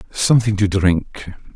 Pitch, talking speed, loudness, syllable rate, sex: 100 Hz, 115 wpm, -17 LUFS, 4.5 syllables/s, male